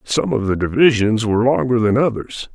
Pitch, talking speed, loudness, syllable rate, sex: 115 Hz, 190 wpm, -17 LUFS, 5.4 syllables/s, male